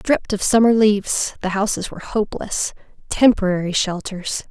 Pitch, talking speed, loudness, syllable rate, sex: 205 Hz, 120 wpm, -19 LUFS, 5.4 syllables/s, female